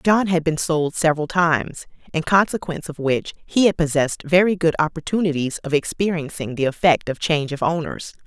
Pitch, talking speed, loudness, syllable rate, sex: 160 Hz, 175 wpm, -20 LUFS, 5.6 syllables/s, female